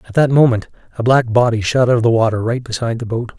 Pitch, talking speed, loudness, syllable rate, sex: 120 Hz, 265 wpm, -15 LUFS, 7.0 syllables/s, male